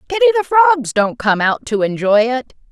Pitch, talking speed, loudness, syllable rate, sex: 255 Hz, 200 wpm, -15 LUFS, 5.6 syllables/s, female